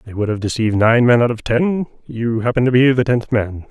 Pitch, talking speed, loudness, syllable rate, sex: 115 Hz, 245 wpm, -16 LUFS, 5.7 syllables/s, male